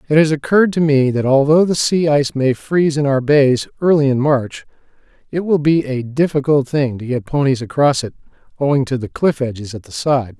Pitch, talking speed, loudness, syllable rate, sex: 140 Hz, 215 wpm, -16 LUFS, 5.5 syllables/s, male